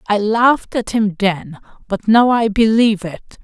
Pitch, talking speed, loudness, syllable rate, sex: 215 Hz, 175 wpm, -15 LUFS, 4.4 syllables/s, female